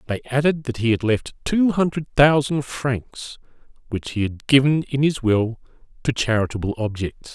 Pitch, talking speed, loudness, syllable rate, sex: 130 Hz, 165 wpm, -21 LUFS, 4.6 syllables/s, male